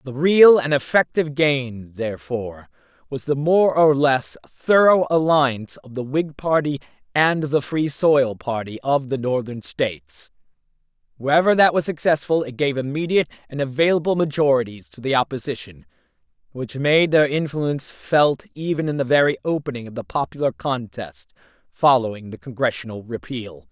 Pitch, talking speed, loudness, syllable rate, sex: 140 Hz, 145 wpm, -20 LUFS, 5.0 syllables/s, male